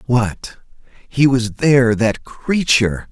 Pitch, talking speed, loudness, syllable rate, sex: 125 Hz, 115 wpm, -16 LUFS, 3.5 syllables/s, male